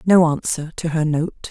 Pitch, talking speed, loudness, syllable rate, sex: 160 Hz, 200 wpm, -20 LUFS, 4.4 syllables/s, female